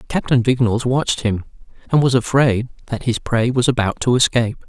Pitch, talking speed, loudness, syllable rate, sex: 120 Hz, 180 wpm, -18 LUFS, 5.7 syllables/s, male